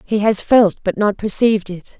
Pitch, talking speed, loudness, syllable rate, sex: 205 Hz, 210 wpm, -16 LUFS, 5.0 syllables/s, female